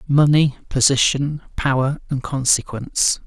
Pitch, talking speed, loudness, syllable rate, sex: 135 Hz, 90 wpm, -18 LUFS, 4.4 syllables/s, male